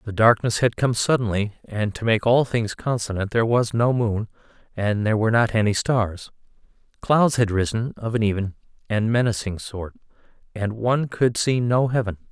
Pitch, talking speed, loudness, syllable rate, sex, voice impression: 110 Hz, 175 wpm, -22 LUFS, 5.2 syllables/s, male, masculine, adult-like, slightly calm, kind